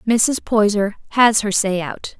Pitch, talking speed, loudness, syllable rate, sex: 215 Hz, 165 wpm, -17 LUFS, 4.0 syllables/s, female